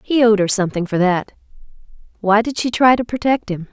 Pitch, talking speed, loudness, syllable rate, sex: 215 Hz, 195 wpm, -17 LUFS, 5.8 syllables/s, female